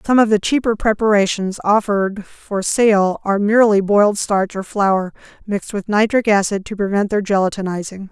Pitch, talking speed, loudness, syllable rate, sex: 205 Hz, 165 wpm, -17 LUFS, 5.3 syllables/s, female